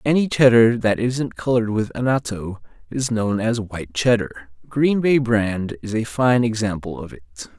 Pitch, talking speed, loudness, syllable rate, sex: 110 Hz, 165 wpm, -20 LUFS, 4.7 syllables/s, male